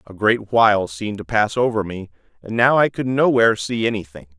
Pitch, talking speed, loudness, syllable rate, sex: 110 Hz, 205 wpm, -18 LUFS, 5.7 syllables/s, male